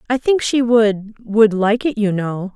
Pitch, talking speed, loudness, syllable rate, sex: 220 Hz, 190 wpm, -16 LUFS, 4.1 syllables/s, female